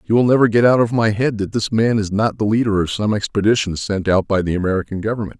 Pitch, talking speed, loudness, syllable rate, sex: 105 Hz, 265 wpm, -17 LUFS, 6.4 syllables/s, male